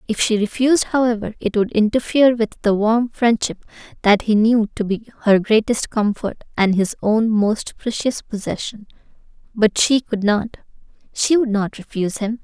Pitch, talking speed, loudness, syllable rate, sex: 220 Hz, 165 wpm, -18 LUFS, 4.9 syllables/s, female